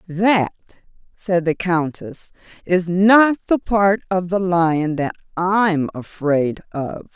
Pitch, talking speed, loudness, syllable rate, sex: 180 Hz, 125 wpm, -18 LUFS, 3.2 syllables/s, female